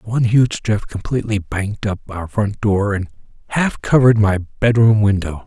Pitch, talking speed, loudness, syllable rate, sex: 105 Hz, 165 wpm, -17 LUFS, 4.9 syllables/s, male